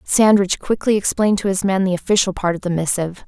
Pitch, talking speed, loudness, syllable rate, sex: 190 Hz, 220 wpm, -18 LUFS, 6.6 syllables/s, female